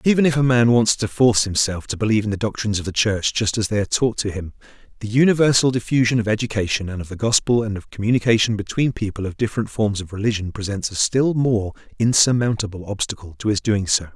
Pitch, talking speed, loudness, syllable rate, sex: 110 Hz, 225 wpm, -20 LUFS, 6.5 syllables/s, male